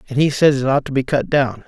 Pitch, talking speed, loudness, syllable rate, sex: 135 Hz, 325 wpm, -17 LUFS, 6.0 syllables/s, male